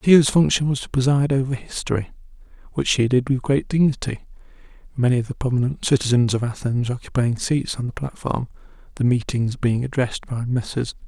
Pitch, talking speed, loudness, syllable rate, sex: 125 Hz, 165 wpm, -21 LUFS, 5.6 syllables/s, male